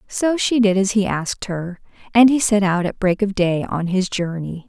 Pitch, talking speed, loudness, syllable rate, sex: 195 Hz, 230 wpm, -19 LUFS, 4.8 syllables/s, female